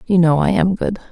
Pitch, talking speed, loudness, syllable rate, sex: 180 Hz, 270 wpm, -16 LUFS, 5.5 syllables/s, female